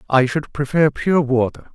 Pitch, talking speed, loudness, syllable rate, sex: 140 Hz, 170 wpm, -18 LUFS, 4.7 syllables/s, male